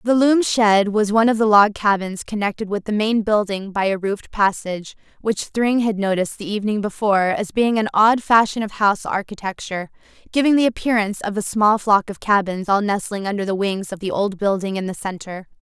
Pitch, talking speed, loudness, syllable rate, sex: 205 Hz, 205 wpm, -19 LUFS, 5.7 syllables/s, female